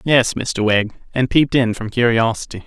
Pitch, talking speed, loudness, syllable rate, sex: 120 Hz, 180 wpm, -17 LUFS, 5.1 syllables/s, male